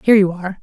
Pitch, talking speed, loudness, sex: 195 Hz, 290 wpm, -15 LUFS, female